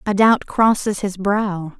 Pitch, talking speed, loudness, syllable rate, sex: 200 Hz, 165 wpm, -18 LUFS, 3.6 syllables/s, female